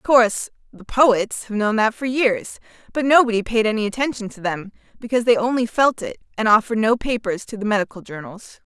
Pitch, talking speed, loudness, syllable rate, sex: 225 Hz, 200 wpm, -20 LUFS, 5.8 syllables/s, female